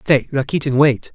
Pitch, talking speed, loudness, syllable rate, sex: 135 Hz, 155 wpm, -17 LUFS, 4.6 syllables/s, male